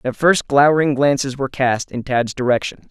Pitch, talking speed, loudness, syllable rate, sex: 135 Hz, 185 wpm, -17 LUFS, 5.6 syllables/s, male